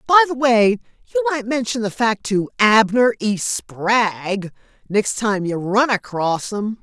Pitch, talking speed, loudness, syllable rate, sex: 225 Hz, 160 wpm, -18 LUFS, 3.7 syllables/s, female